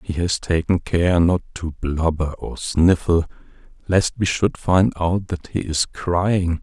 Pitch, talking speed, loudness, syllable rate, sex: 85 Hz, 165 wpm, -20 LUFS, 3.8 syllables/s, male